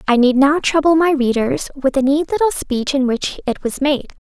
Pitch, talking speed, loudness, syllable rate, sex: 280 Hz, 225 wpm, -16 LUFS, 4.9 syllables/s, female